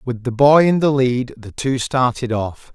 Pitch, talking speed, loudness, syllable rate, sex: 125 Hz, 220 wpm, -17 LUFS, 4.2 syllables/s, male